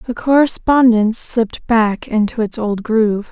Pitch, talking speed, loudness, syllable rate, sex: 225 Hz, 145 wpm, -15 LUFS, 4.6 syllables/s, female